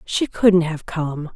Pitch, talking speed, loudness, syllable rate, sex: 170 Hz, 180 wpm, -19 LUFS, 3.2 syllables/s, female